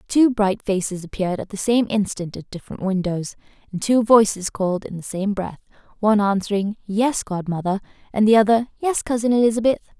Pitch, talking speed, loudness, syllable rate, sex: 205 Hz, 175 wpm, -20 LUFS, 5.7 syllables/s, female